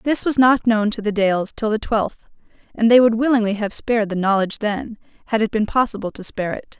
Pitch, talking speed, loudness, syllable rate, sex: 220 Hz, 230 wpm, -19 LUFS, 5.8 syllables/s, female